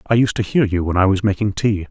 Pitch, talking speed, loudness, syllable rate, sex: 100 Hz, 315 wpm, -18 LUFS, 6.2 syllables/s, male